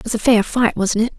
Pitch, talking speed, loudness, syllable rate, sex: 220 Hz, 355 wpm, -17 LUFS, 6.7 syllables/s, female